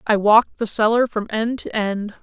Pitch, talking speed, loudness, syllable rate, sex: 220 Hz, 215 wpm, -19 LUFS, 5.0 syllables/s, female